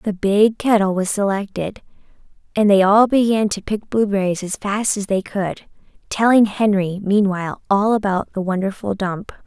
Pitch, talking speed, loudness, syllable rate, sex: 205 Hz, 160 wpm, -18 LUFS, 4.7 syllables/s, female